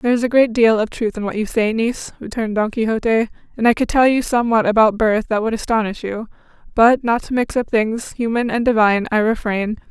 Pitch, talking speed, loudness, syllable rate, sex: 225 Hz, 230 wpm, -17 LUFS, 6.0 syllables/s, female